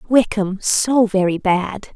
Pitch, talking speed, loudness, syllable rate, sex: 205 Hz, 125 wpm, -17 LUFS, 3.6 syllables/s, female